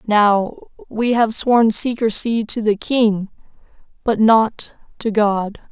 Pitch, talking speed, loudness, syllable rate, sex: 220 Hz, 125 wpm, -17 LUFS, 3.3 syllables/s, female